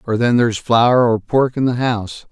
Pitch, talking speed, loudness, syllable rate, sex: 120 Hz, 235 wpm, -16 LUFS, 5.1 syllables/s, male